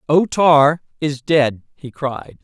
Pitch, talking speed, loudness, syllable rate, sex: 145 Hz, 150 wpm, -17 LUFS, 3.1 syllables/s, male